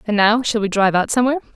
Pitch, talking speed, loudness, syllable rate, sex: 220 Hz, 270 wpm, -17 LUFS, 8.5 syllables/s, female